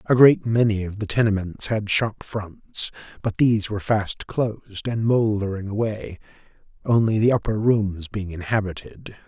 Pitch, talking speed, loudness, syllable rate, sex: 105 Hz, 150 wpm, -22 LUFS, 4.6 syllables/s, male